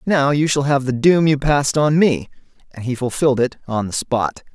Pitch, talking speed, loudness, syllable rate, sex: 135 Hz, 225 wpm, -18 LUFS, 5.2 syllables/s, male